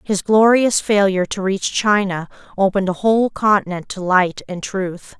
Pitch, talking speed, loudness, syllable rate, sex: 195 Hz, 160 wpm, -17 LUFS, 4.8 syllables/s, female